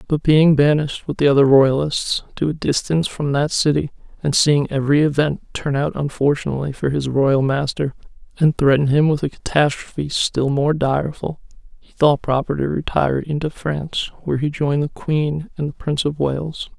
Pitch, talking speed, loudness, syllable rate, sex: 145 Hz, 180 wpm, -19 LUFS, 5.3 syllables/s, male